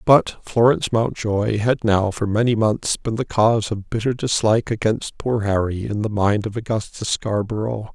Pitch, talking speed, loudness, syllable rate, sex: 110 Hz, 175 wpm, -20 LUFS, 4.8 syllables/s, male